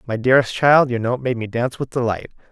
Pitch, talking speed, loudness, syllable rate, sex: 125 Hz, 215 wpm, -18 LUFS, 6.4 syllables/s, male